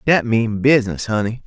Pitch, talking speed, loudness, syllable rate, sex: 115 Hz, 165 wpm, -17 LUFS, 5.2 syllables/s, male